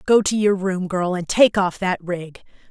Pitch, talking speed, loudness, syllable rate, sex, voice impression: 185 Hz, 220 wpm, -20 LUFS, 4.4 syllables/s, female, very feminine, middle-aged, thin, tensed, powerful, slightly dark, slightly hard, clear, fluent, slightly raspy, slightly cool, intellectual, refreshing, slightly sincere, calm, slightly friendly, slightly reassuring, unique, slightly elegant, slightly wild, slightly sweet, lively, slightly strict, slightly intense, sharp, slightly light